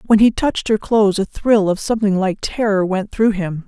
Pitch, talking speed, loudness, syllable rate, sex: 205 Hz, 230 wpm, -17 LUFS, 5.4 syllables/s, female